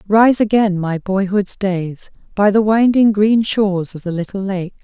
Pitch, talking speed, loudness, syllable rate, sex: 200 Hz, 175 wpm, -16 LUFS, 4.3 syllables/s, female